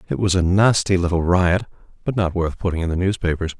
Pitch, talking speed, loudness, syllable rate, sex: 90 Hz, 215 wpm, -20 LUFS, 6.0 syllables/s, male